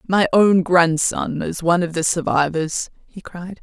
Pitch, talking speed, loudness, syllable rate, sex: 175 Hz, 165 wpm, -18 LUFS, 4.3 syllables/s, female